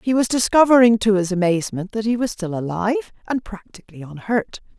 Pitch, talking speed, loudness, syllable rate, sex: 210 Hz, 175 wpm, -19 LUFS, 6.2 syllables/s, female